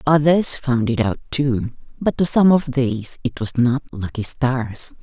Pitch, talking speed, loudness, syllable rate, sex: 130 Hz, 180 wpm, -19 LUFS, 4.1 syllables/s, female